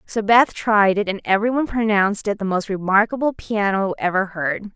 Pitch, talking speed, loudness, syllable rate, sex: 205 Hz, 175 wpm, -19 LUFS, 5.3 syllables/s, female